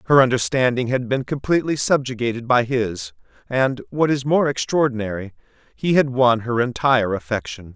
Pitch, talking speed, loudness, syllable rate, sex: 125 Hz, 145 wpm, -20 LUFS, 5.4 syllables/s, male